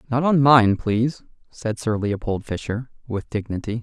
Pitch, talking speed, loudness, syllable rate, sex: 115 Hz, 155 wpm, -21 LUFS, 4.7 syllables/s, male